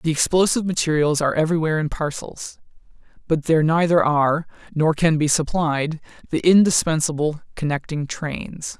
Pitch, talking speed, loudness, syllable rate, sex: 155 Hz, 130 wpm, -20 LUFS, 5.4 syllables/s, male